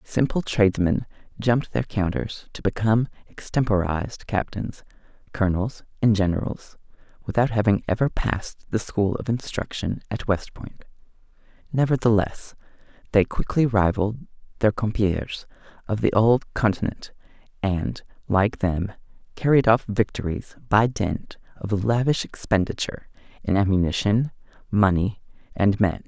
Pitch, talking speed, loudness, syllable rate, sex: 105 Hz, 115 wpm, -23 LUFS, 4.8 syllables/s, male